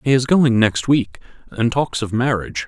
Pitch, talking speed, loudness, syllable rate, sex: 120 Hz, 200 wpm, -18 LUFS, 4.9 syllables/s, male